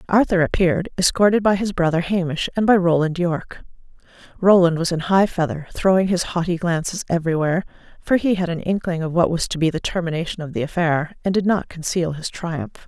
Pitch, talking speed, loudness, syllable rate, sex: 175 Hz, 195 wpm, -20 LUFS, 5.9 syllables/s, female